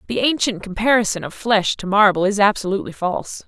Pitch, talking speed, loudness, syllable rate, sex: 205 Hz, 175 wpm, -18 LUFS, 6.1 syllables/s, female